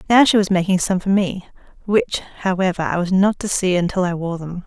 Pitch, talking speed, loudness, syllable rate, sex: 185 Hz, 230 wpm, -19 LUFS, 6.0 syllables/s, female